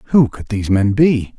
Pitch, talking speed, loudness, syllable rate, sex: 115 Hz, 215 wpm, -15 LUFS, 5.4 syllables/s, male